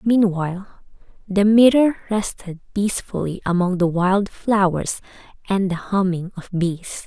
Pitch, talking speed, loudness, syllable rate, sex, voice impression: 190 Hz, 120 wpm, -20 LUFS, 4.3 syllables/s, female, very feminine, slightly young, slightly adult-like, thin, slightly relaxed, slightly weak, slightly dark, soft, slightly clear, fluent, very cute, intellectual, very refreshing, sincere, very calm, very friendly, very reassuring, very unique, very elegant, slightly wild, slightly sweet, very kind, modest